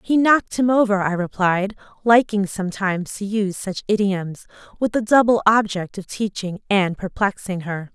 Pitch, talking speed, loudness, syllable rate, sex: 200 Hz, 160 wpm, -20 LUFS, 4.9 syllables/s, female